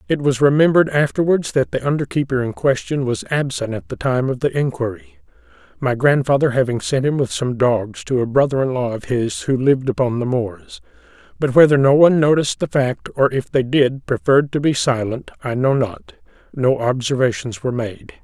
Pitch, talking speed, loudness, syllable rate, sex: 130 Hz, 195 wpm, -18 LUFS, 5.4 syllables/s, male